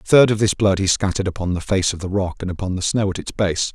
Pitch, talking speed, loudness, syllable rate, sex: 95 Hz, 320 wpm, -20 LUFS, 6.6 syllables/s, male